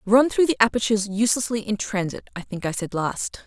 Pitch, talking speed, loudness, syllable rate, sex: 215 Hz, 210 wpm, -22 LUFS, 6.0 syllables/s, female